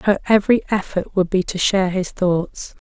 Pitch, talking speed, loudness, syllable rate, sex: 190 Hz, 190 wpm, -19 LUFS, 5.1 syllables/s, female